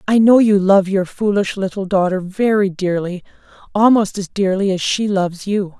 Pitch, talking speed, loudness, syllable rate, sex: 195 Hz, 175 wpm, -16 LUFS, 4.9 syllables/s, female